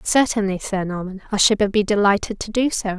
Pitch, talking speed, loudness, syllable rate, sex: 205 Hz, 200 wpm, -20 LUFS, 5.4 syllables/s, female